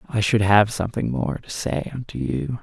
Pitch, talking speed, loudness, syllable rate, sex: 110 Hz, 205 wpm, -22 LUFS, 4.9 syllables/s, male